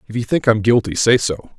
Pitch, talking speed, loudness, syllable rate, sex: 115 Hz, 265 wpm, -16 LUFS, 5.8 syllables/s, male